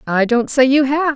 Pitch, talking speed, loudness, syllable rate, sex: 265 Hz, 260 wpm, -15 LUFS, 4.7 syllables/s, female